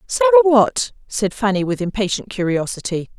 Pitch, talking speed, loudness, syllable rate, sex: 230 Hz, 130 wpm, -18 LUFS, 5.2 syllables/s, female